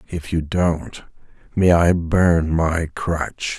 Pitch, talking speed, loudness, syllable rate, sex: 85 Hz, 135 wpm, -19 LUFS, 2.8 syllables/s, male